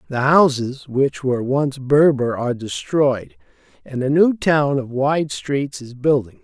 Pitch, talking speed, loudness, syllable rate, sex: 140 Hz, 160 wpm, -19 LUFS, 4.0 syllables/s, male